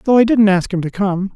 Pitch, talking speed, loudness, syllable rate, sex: 200 Hz, 310 wpm, -15 LUFS, 5.7 syllables/s, male